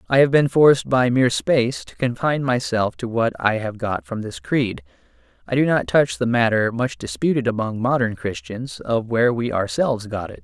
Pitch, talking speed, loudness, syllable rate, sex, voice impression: 120 Hz, 200 wpm, -20 LUFS, 5.2 syllables/s, male, very masculine, very middle-aged, very thick, tensed, slightly powerful, bright, soft, clear, fluent, raspy, cool, very intellectual, refreshing, sincere, calm, mature, very friendly, very reassuring, unique, elegant, sweet, lively, kind, slightly modest